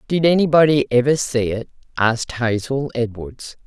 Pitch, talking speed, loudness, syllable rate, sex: 130 Hz, 130 wpm, -18 LUFS, 4.8 syllables/s, female